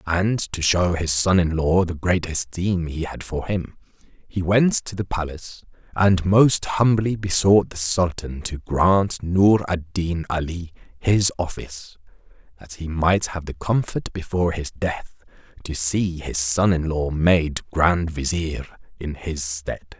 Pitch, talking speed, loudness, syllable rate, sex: 85 Hz, 160 wpm, -21 LUFS, 3.9 syllables/s, male